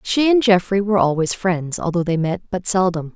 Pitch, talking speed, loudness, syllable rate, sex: 190 Hz, 210 wpm, -18 LUFS, 5.4 syllables/s, female